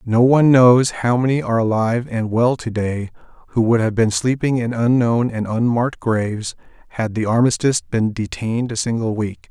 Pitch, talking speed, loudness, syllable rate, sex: 115 Hz, 175 wpm, -18 LUFS, 5.3 syllables/s, male